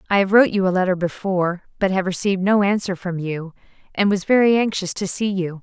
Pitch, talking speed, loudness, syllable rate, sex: 190 Hz, 225 wpm, -19 LUFS, 6.1 syllables/s, female